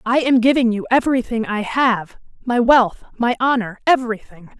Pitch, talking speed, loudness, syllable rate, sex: 235 Hz, 155 wpm, -17 LUFS, 5.1 syllables/s, female